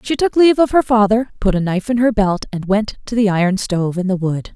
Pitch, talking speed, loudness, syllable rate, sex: 210 Hz, 275 wpm, -16 LUFS, 6.1 syllables/s, female